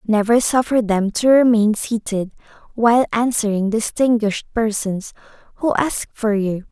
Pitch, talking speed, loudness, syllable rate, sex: 225 Hz, 125 wpm, -18 LUFS, 4.6 syllables/s, female